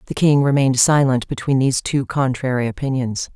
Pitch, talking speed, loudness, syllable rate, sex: 130 Hz, 160 wpm, -18 LUFS, 5.7 syllables/s, female